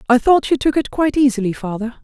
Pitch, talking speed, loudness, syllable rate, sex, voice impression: 255 Hz, 235 wpm, -17 LUFS, 6.7 syllables/s, female, feminine, slightly gender-neutral, young, adult-like, powerful, very soft, clear, fluent, slightly cool, intellectual, sincere, calm, slightly friendly, reassuring, very elegant, sweet, slightly lively, kind, slightly modest